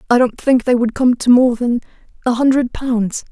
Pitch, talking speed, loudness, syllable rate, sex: 245 Hz, 215 wpm, -15 LUFS, 5.0 syllables/s, female